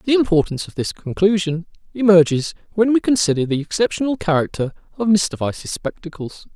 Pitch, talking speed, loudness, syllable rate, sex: 185 Hz, 145 wpm, -19 LUFS, 5.6 syllables/s, male